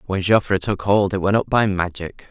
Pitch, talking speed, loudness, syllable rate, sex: 95 Hz, 235 wpm, -19 LUFS, 5.1 syllables/s, male